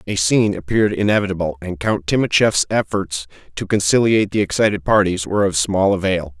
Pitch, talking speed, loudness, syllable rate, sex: 95 Hz, 160 wpm, -18 LUFS, 5.9 syllables/s, male